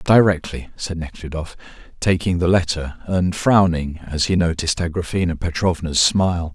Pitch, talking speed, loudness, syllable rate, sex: 85 Hz, 130 wpm, -20 LUFS, 5.0 syllables/s, male